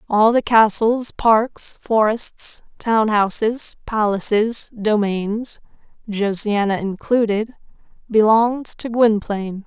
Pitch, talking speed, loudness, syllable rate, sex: 220 Hz, 85 wpm, -18 LUFS, 3.4 syllables/s, female